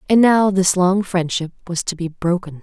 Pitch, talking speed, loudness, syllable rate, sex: 180 Hz, 205 wpm, -18 LUFS, 4.8 syllables/s, female